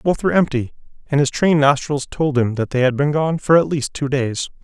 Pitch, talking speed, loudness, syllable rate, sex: 140 Hz, 245 wpm, -18 LUFS, 5.6 syllables/s, male